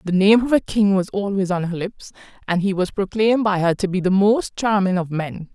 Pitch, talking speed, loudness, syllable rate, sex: 195 Hz, 250 wpm, -19 LUFS, 5.4 syllables/s, female